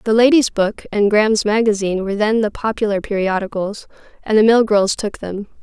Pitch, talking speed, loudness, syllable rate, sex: 210 Hz, 180 wpm, -17 LUFS, 5.6 syllables/s, female